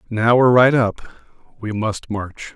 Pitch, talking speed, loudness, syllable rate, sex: 115 Hz, 190 wpm, -17 LUFS, 4.6 syllables/s, male